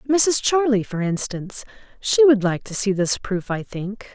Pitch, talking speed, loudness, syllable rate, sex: 220 Hz, 175 wpm, -20 LUFS, 4.5 syllables/s, female